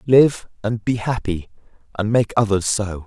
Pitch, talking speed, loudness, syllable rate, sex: 110 Hz, 155 wpm, -20 LUFS, 4.3 syllables/s, male